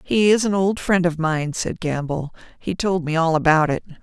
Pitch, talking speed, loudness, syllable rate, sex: 170 Hz, 225 wpm, -20 LUFS, 4.8 syllables/s, female